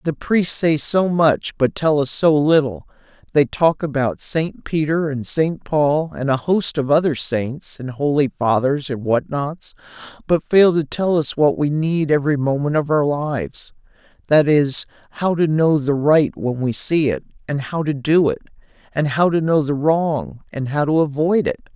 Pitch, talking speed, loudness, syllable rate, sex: 150 Hz, 195 wpm, -18 LUFS, 4.4 syllables/s, male